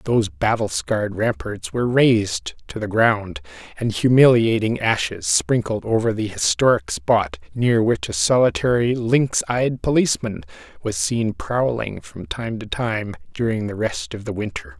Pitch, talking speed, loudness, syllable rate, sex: 115 Hz, 150 wpm, -20 LUFS, 4.4 syllables/s, male